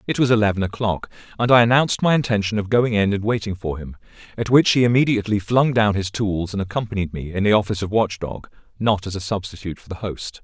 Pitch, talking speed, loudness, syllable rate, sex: 105 Hz, 225 wpm, -20 LUFS, 6.5 syllables/s, male